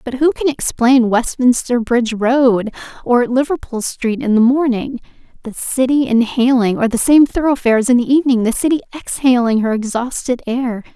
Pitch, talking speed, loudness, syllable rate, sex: 250 Hz, 140 wpm, -15 LUFS, 5.0 syllables/s, female